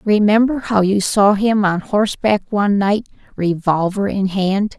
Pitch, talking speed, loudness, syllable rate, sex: 200 Hz, 150 wpm, -16 LUFS, 4.4 syllables/s, female